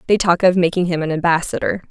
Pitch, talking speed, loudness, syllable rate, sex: 175 Hz, 220 wpm, -17 LUFS, 6.6 syllables/s, female